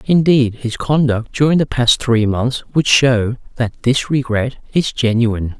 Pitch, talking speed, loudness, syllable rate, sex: 125 Hz, 160 wpm, -16 LUFS, 4.2 syllables/s, male